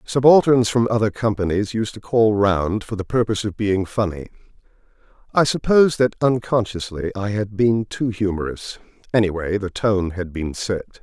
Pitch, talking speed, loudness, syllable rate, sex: 105 Hz, 150 wpm, -20 LUFS, 5.0 syllables/s, male